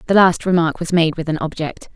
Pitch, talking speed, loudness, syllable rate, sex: 165 Hz, 245 wpm, -18 LUFS, 5.8 syllables/s, female